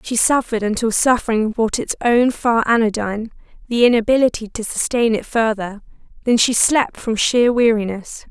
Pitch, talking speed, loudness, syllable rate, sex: 230 Hz, 135 wpm, -17 LUFS, 5.1 syllables/s, female